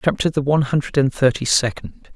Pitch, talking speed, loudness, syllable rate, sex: 140 Hz, 195 wpm, -18 LUFS, 5.9 syllables/s, male